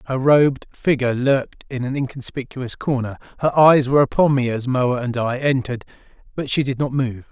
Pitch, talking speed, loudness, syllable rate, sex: 130 Hz, 190 wpm, -19 LUFS, 5.6 syllables/s, male